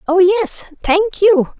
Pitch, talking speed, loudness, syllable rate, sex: 375 Hz, 115 wpm, -14 LUFS, 3.3 syllables/s, female